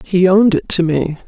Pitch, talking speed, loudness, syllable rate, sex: 180 Hz, 235 wpm, -14 LUFS, 5.5 syllables/s, female